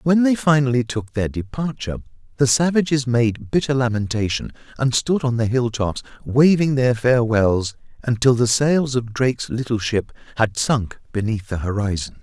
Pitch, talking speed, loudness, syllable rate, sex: 120 Hz, 150 wpm, -20 LUFS, 4.9 syllables/s, male